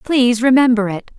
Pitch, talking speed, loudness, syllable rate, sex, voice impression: 240 Hz, 150 wpm, -14 LUFS, 5.7 syllables/s, female, very feminine, very adult-like, very middle-aged, very thin, tensed, powerful, very bright, dark, soft, very clear, very fluent, very cute, intellectual, very refreshing, very sincere, calm, friendly, reassuring, very unique, very elegant, slightly wild, sweet, very lively, kind, slightly modest, light